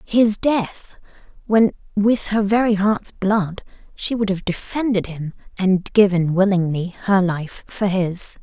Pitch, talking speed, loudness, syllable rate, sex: 195 Hz, 145 wpm, -19 LUFS, 3.7 syllables/s, female